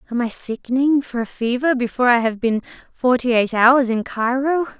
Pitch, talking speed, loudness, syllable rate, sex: 245 Hz, 190 wpm, -19 LUFS, 5.3 syllables/s, female